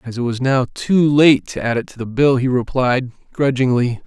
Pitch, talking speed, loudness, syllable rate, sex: 125 Hz, 220 wpm, -17 LUFS, 4.9 syllables/s, male